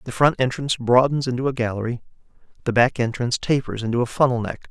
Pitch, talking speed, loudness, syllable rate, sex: 125 Hz, 190 wpm, -21 LUFS, 6.8 syllables/s, male